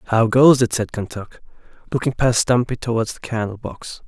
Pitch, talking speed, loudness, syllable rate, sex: 120 Hz, 175 wpm, -19 LUFS, 4.9 syllables/s, male